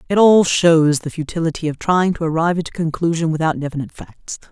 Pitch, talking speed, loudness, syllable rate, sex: 165 Hz, 200 wpm, -17 LUFS, 6.2 syllables/s, female